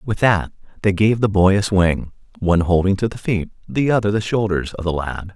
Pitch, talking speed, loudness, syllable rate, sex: 100 Hz, 225 wpm, -19 LUFS, 5.3 syllables/s, male